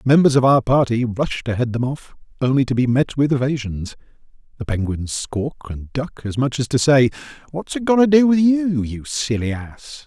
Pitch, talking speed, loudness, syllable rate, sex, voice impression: 135 Hz, 205 wpm, -19 LUFS, 4.9 syllables/s, male, masculine, middle-aged, powerful, hard, slightly halting, raspy, cool, mature, slightly friendly, wild, lively, strict, intense